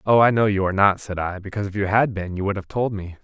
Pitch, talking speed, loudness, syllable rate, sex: 100 Hz, 335 wpm, -21 LUFS, 6.8 syllables/s, male